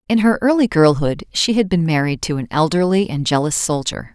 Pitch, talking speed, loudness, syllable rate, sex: 175 Hz, 200 wpm, -17 LUFS, 5.4 syllables/s, female